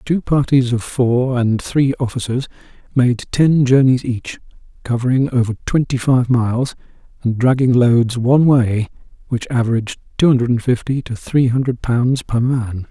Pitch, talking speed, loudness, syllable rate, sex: 125 Hz, 150 wpm, -16 LUFS, 4.6 syllables/s, male